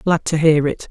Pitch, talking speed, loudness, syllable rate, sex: 160 Hz, 265 wpm, -16 LUFS, 4.6 syllables/s, female